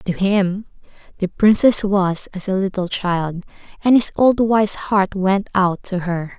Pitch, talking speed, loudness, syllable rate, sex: 195 Hz, 170 wpm, -18 LUFS, 3.8 syllables/s, female